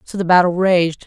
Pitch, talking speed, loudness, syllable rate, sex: 180 Hz, 225 wpm, -15 LUFS, 5.2 syllables/s, female